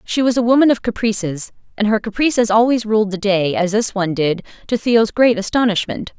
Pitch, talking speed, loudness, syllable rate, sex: 215 Hz, 205 wpm, -17 LUFS, 5.6 syllables/s, female